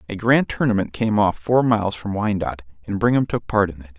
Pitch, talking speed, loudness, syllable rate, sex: 105 Hz, 225 wpm, -20 LUFS, 5.9 syllables/s, male